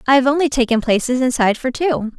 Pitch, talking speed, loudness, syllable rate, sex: 255 Hz, 220 wpm, -17 LUFS, 6.4 syllables/s, female